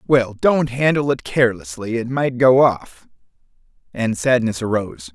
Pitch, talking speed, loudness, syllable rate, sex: 120 Hz, 140 wpm, -18 LUFS, 4.1 syllables/s, male